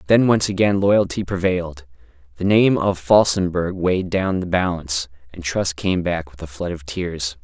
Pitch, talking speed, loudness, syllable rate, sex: 90 Hz, 180 wpm, -20 LUFS, 4.8 syllables/s, male